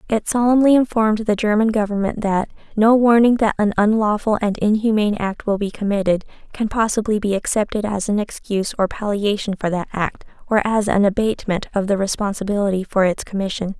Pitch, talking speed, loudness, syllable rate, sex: 210 Hz, 175 wpm, -19 LUFS, 5.8 syllables/s, female